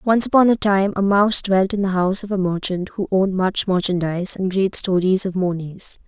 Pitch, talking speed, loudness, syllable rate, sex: 190 Hz, 215 wpm, -19 LUFS, 5.5 syllables/s, female